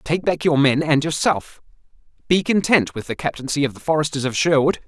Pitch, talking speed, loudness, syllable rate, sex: 150 Hz, 195 wpm, -19 LUFS, 5.7 syllables/s, male